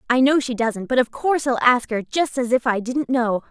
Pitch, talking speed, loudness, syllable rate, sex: 250 Hz, 275 wpm, -20 LUFS, 5.3 syllables/s, female